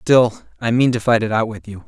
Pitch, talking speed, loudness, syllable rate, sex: 120 Hz, 290 wpm, -18 LUFS, 5.4 syllables/s, male